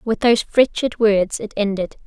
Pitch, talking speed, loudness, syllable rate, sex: 215 Hz, 175 wpm, -18 LUFS, 5.2 syllables/s, female